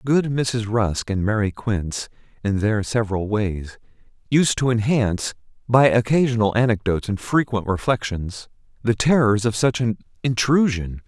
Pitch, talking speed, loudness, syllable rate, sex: 115 Hz, 135 wpm, -21 LUFS, 4.7 syllables/s, male